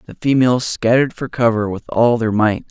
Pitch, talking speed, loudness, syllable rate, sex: 115 Hz, 200 wpm, -16 LUFS, 5.6 syllables/s, male